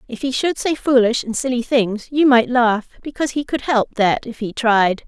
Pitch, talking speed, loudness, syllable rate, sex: 245 Hz, 225 wpm, -18 LUFS, 4.9 syllables/s, female